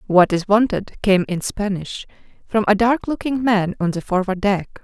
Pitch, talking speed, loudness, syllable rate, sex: 200 Hz, 185 wpm, -19 LUFS, 4.6 syllables/s, female